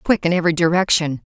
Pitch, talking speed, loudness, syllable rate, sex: 170 Hz, 185 wpm, -17 LUFS, 7.0 syllables/s, female